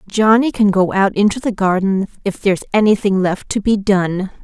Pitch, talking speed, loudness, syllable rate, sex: 200 Hz, 190 wpm, -15 LUFS, 5.1 syllables/s, female